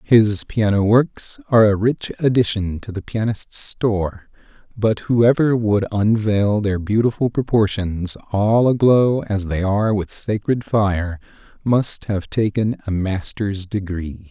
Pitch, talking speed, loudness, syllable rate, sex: 105 Hz, 135 wpm, -19 LUFS, 3.9 syllables/s, male